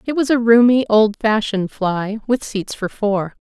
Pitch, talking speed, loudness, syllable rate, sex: 215 Hz, 175 wpm, -17 LUFS, 4.5 syllables/s, female